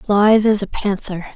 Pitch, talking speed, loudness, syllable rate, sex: 205 Hz, 175 wpm, -16 LUFS, 5.1 syllables/s, female